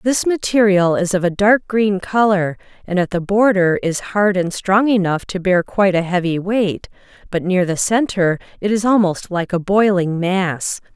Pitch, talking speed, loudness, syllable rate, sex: 190 Hz, 185 wpm, -17 LUFS, 4.5 syllables/s, female